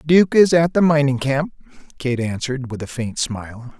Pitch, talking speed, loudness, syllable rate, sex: 140 Hz, 190 wpm, -18 LUFS, 5.0 syllables/s, male